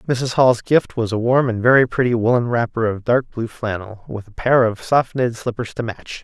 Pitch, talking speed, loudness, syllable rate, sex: 120 Hz, 230 wpm, -18 LUFS, 5.2 syllables/s, male